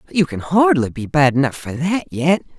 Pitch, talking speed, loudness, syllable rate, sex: 145 Hz, 230 wpm, -17 LUFS, 5.3 syllables/s, male